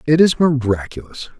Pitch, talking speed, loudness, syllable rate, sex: 130 Hz, 130 wpm, -16 LUFS, 5.1 syllables/s, male